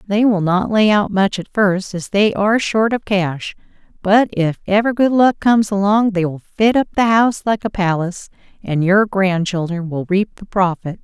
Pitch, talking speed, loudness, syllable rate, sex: 200 Hz, 200 wpm, -16 LUFS, 4.7 syllables/s, female